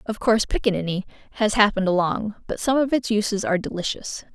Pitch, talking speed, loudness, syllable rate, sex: 210 Hz, 180 wpm, -22 LUFS, 6.6 syllables/s, female